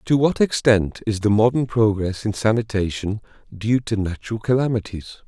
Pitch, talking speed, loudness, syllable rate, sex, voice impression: 110 Hz, 150 wpm, -20 LUFS, 5.1 syllables/s, male, very masculine, slightly old, thick, slightly tensed, slightly weak, slightly dark, soft, muffled, slightly fluent, slightly raspy, slightly cool, intellectual, slightly refreshing, sincere, calm, mature, slightly friendly, slightly reassuring, unique, slightly elegant, wild, slightly sweet, lively, very kind, modest